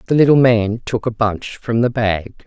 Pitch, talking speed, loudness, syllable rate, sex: 115 Hz, 220 wpm, -16 LUFS, 4.6 syllables/s, female